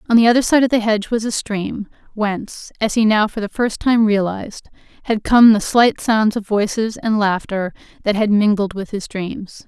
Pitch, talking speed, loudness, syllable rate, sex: 215 Hz, 210 wpm, -17 LUFS, 5.0 syllables/s, female